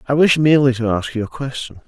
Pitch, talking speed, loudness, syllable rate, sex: 130 Hz, 255 wpm, -17 LUFS, 6.6 syllables/s, male